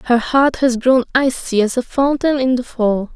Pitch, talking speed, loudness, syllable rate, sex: 250 Hz, 210 wpm, -16 LUFS, 4.6 syllables/s, female